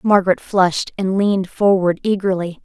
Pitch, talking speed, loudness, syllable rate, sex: 190 Hz, 135 wpm, -17 LUFS, 5.3 syllables/s, female